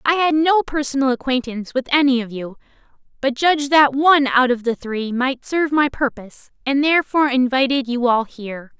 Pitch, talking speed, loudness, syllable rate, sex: 265 Hz, 185 wpm, -18 LUFS, 5.6 syllables/s, female